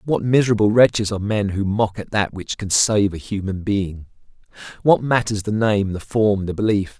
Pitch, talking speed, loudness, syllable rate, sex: 105 Hz, 195 wpm, -19 LUFS, 5.1 syllables/s, male